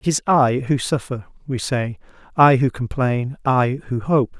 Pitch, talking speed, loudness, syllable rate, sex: 130 Hz, 180 wpm, -19 LUFS, 4.2 syllables/s, male